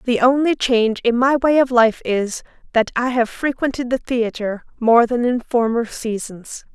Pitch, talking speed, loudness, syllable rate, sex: 240 Hz, 180 wpm, -18 LUFS, 4.6 syllables/s, female